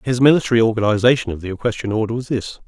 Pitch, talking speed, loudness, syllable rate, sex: 115 Hz, 200 wpm, -18 LUFS, 7.5 syllables/s, male